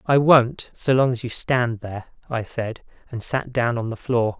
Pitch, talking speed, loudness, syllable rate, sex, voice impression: 120 Hz, 220 wpm, -22 LUFS, 4.6 syllables/s, male, masculine, slightly young, slightly adult-like, slightly thick, relaxed, slightly weak, slightly dark, soft, slightly muffled, fluent, slightly cool, intellectual, slightly sincere, very calm, slightly friendly, slightly unique, slightly elegant, slightly sweet, very kind, modest